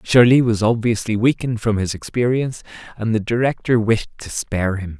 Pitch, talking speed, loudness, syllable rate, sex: 115 Hz, 170 wpm, -19 LUFS, 5.5 syllables/s, male